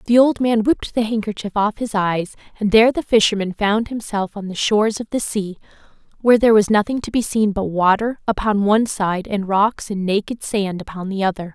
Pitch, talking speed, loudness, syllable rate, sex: 210 Hz, 215 wpm, -18 LUFS, 5.6 syllables/s, female